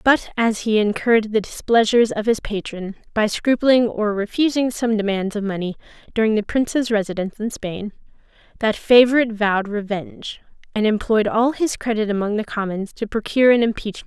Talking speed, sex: 180 wpm, female